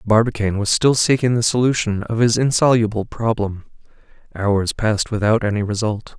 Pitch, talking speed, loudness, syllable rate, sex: 110 Hz, 145 wpm, -18 LUFS, 5.4 syllables/s, male